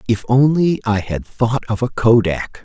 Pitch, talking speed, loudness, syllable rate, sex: 115 Hz, 180 wpm, -17 LUFS, 4.2 syllables/s, male